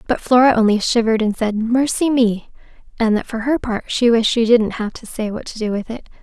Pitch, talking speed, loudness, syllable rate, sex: 230 Hz, 240 wpm, -17 LUFS, 5.6 syllables/s, female